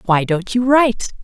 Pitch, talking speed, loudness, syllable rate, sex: 220 Hz, 195 wpm, -16 LUFS, 5.3 syllables/s, female